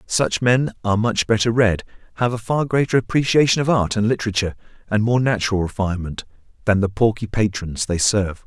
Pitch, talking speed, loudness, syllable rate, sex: 110 Hz, 175 wpm, -19 LUFS, 6.0 syllables/s, male